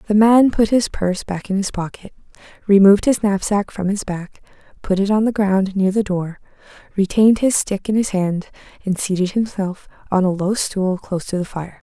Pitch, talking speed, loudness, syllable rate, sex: 195 Hz, 200 wpm, -18 LUFS, 5.2 syllables/s, female